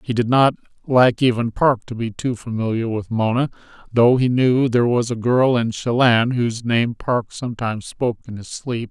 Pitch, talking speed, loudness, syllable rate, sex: 120 Hz, 195 wpm, -19 LUFS, 5.1 syllables/s, male